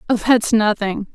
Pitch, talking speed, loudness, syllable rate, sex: 220 Hz, 160 wpm, -17 LUFS, 4.4 syllables/s, female